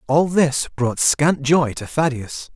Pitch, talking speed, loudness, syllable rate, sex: 145 Hz, 165 wpm, -19 LUFS, 3.5 syllables/s, male